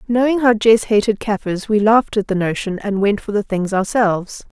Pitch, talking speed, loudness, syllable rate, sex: 210 Hz, 210 wpm, -17 LUFS, 5.3 syllables/s, female